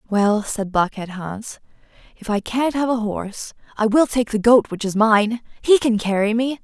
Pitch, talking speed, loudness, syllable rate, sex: 225 Hz, 200 wpm, -19 LUFS, 4.6 syllables/s, female